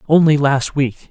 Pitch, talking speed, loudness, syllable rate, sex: 145 Hz, 165 wpm, -15 LUFS, 4.1 syllables/s, male